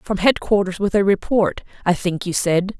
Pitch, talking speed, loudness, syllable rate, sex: 195 Hz, 195 wpm, -19 LUFS, 4.8 syllables/s, female